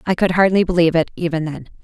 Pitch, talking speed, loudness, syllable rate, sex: 170 Hz, 230 wpm, -17 LUFS, 7.1 syllables/s, female